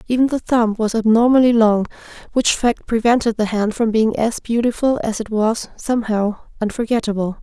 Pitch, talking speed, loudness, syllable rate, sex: 225 Hz, 160 wpm, -18 LUFS, 5.2 syllables/s, female